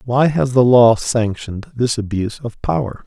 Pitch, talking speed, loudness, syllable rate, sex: 120 Hz, 175 wpm, -16 LUFS, 4.8 syllables/s, male